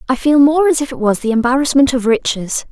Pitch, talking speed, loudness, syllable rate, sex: 265 Hz, 245 wpm, -14 LUFS, 6.0 syllables/s, female